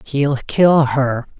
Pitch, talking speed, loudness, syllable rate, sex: 140 Hz, 130 wpm, -16 LUFS, 2.7 syllables/s, male